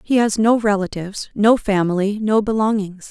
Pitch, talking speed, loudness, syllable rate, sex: 210 Hz, 155 wpm, -18 LUFS, 5.1 syllables/s, female